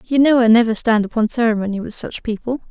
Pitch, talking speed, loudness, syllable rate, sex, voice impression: 230 Hz, 220 wpm, -17 LUFS, 6.3 syllables/s, female, feminine, middle-aged, relaxed, slightly weak, slightly dark, muffled, slightly raspy, slightly intellectual, calm, slightly kind, modest